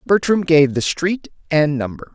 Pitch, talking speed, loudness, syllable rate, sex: 160 Hz, 170 wpm, -18 LUFS, 4.4 syllables/s, male